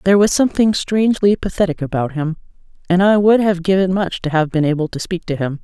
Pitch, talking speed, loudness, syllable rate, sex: 180 Hz, 225 wpm, -16 LUFS, 6.2 syllables/s, female